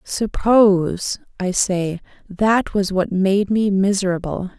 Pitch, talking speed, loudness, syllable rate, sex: 195 Hz, 120 wpm, -18 LUFS, 3.5 syllables/s, female